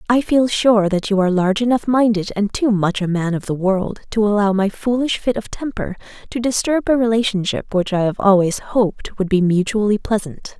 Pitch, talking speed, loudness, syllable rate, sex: 210 Hz, 210 wpm, -18 LUFS, 5.3 syllables/s, female